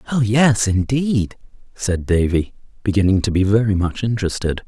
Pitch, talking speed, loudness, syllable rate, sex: 105 Hz, 140 wpm, -18 LUFS, 5.1 syllables/s, male